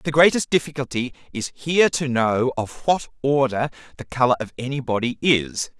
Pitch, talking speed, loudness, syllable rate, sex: 135 Hz, 165 wpm, -21 LUFS, 5.1 syllables/s, male